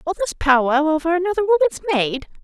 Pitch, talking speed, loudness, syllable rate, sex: 330 Hz, 175 wpm, -18 LUFS, 8.2 syllables/s, female